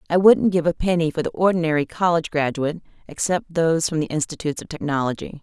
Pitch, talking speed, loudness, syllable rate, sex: 165 Hz, 190 wpm, -21 LUFS, 6.7 syllables/s, female